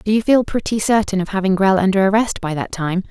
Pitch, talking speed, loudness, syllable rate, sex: 200 Hz, 250 wpm, -17 LUFS, 5.9 syllables/s, female